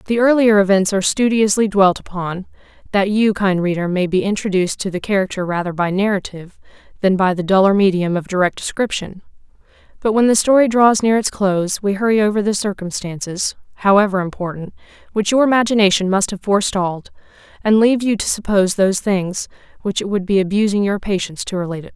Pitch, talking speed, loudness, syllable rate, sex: 200 Hz, 185 wpm, -17 LUFS, 6.2 syllables/s, female